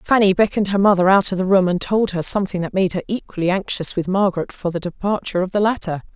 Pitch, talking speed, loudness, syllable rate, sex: 190 Hz, 245 wpm, -18 LUFS, 6.7 syllables/s, female